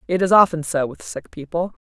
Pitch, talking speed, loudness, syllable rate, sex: 170 Hz, 230 wpm, -19 LUFS, 5.6 syllables/s, female